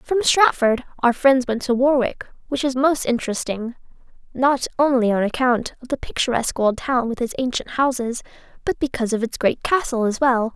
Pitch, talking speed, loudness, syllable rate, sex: 250 Hz, 180 wpm, -20 LUFS, 5.3 syllables/s, female